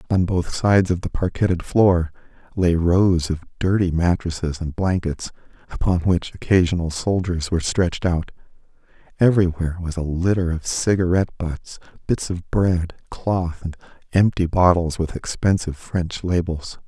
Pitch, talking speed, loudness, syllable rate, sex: 90 Hz, 140 wpm, -21 LUFS, 4.9 syllables/s, male